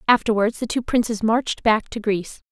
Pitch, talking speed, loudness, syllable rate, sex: 225 Hz, 190 wpm, -21 LUFS, 5.7 syllables/s, female